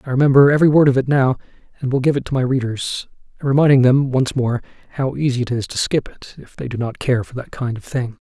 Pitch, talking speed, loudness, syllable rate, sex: 130 Hz, 255 wpm, -18 LUFS, 6.4 syllables/s, male